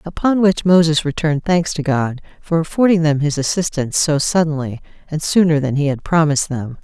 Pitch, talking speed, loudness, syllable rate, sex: 155 Hz, 185 wpm, -16 LUFS, 5.6 syllables/s, female